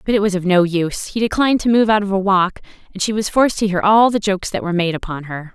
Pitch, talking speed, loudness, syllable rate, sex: 195 Hz, 305 wpm, -17 LUFS, 7.0 syllables/s, female